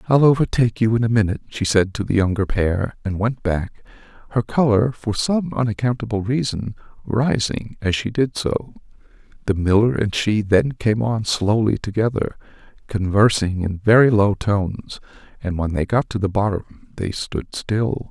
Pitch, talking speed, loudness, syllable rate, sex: 110 Hz, 165 wpm, -20 LUFS, 4.8 syllables/s, male